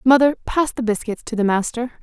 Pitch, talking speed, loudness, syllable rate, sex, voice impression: 240 Hz, 210 wpm, -20 LUFS, 5.9 syllables/s, female, feminine, very adult-like, middle-aged, slightly thin, slightly relaxed, slightly weak, slightly dark, slightly hard, slightly muffled, fluent, slightly cool, intellectual, slightly refreshing, sincere, calm, friendly, reassuring, slightly unique, elegant, slightly sweet, slightly lively, kind, slightly modest